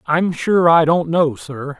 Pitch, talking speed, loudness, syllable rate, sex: 160 Hz, 200 wpm, -15 LUFS, 3.6 syllables/s, male